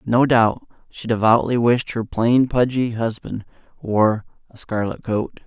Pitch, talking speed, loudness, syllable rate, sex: 115 Hz, 145 wpm, -19 LUFS, 4.0 syllables/s, male